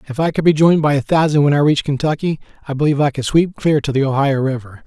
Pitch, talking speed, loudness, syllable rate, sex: 145 Hz, 270 wpm, -16 LUFS, 6.8 syllables/s, male